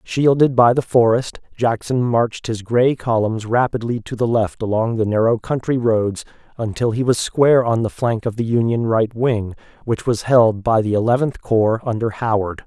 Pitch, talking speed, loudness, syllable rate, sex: 115 Hz, 185 wpm, -18 LUFS, 4.8 syllables/s, male